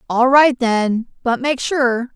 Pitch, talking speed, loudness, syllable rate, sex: 250 Hz, 165 wpm, -16 LUFS, 3.4 syllables/s, female